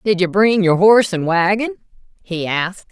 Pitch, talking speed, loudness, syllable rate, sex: 195 Hz, 185 wpm, -15 LUFS, 5.3 syllables/s, female